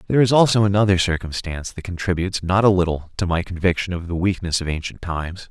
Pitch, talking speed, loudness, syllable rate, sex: 90 Hz, 205 wpm, -20 LUFS, 6.6 syllables/s, male